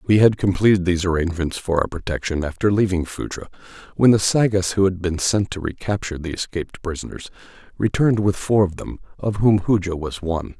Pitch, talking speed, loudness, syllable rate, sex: 95 Hz, 185 wpm, -20 LUFS, 6.0 syllables/s, male